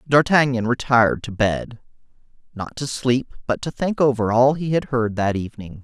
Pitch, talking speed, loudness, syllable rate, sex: 125 Hz, 165 wpm, -20 LUFS, 5.0 syllables/s, male